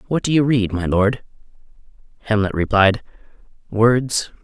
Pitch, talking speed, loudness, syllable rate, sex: 110 Hz, 120 wpm, -18 LUFS, 4.5 syllables/s, male